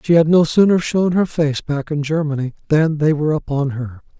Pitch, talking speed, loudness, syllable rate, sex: 155 Hz, 215 wpm, -17 LUFS, 5.3 syllables/s, male